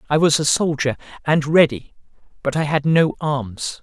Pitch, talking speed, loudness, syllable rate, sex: 145 Hz, 175 wpm, -19 LUFS, 4.6 syllables/s, male